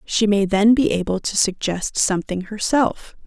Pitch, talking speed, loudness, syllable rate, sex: 205 Hz, 165 wpm, -19 LUFS, 4.5 syllables/s, female